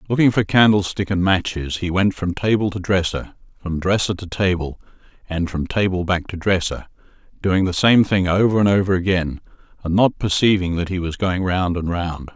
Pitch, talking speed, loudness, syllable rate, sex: 95 Hz, 190 wpm, -19 LUFS, 5.2 syllables/s, male